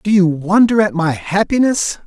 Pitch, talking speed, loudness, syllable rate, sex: 190 Hz, 175 wpm, -15 LUFS, 4.6 syllables/s, male